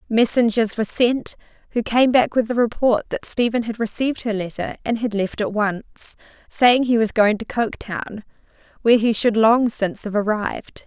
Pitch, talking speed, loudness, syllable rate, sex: 225 Hz, 180 wpm, -20 LUFS, 5.1 syllables/s, female